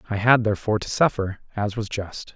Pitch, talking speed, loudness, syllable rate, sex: 105 Hz, 205 wpm, -23 LUFS, 5.9 syllables/s, male